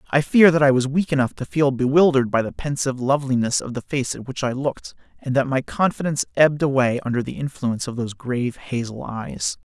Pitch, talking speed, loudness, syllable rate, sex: 135 Hz, 215 wpm, -21 LUFS, 6.2 syllables/s, male